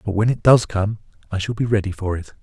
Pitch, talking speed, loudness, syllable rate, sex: 100 Hz, 270 wpm, -20 LUFS, 6.2 syllables/s, male